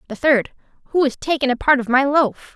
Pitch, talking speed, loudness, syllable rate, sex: 265 Hz, 210 wpm, -18 LUFS, 5.1 syllables/s, female